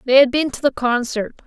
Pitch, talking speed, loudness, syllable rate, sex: 260 Hz, 245 wpm, -18 LUFS, 5.4 syllables/s, female